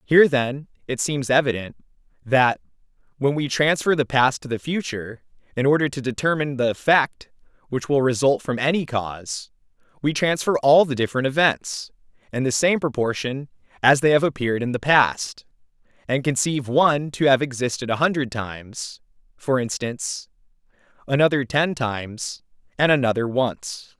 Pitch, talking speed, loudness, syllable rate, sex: 135 Hz, 150 wpm, -21 LUFS, 5.1 syllables/s, male